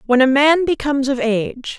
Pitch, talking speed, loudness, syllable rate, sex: 270 Hz, 200 wpm, -16 LUFS, 5.5 syllables/s, female